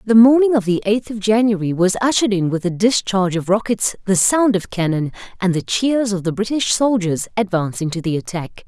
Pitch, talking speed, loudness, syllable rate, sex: 200 Hz, 210 wpm, -17 LUFS, 5.6 syllables/s, female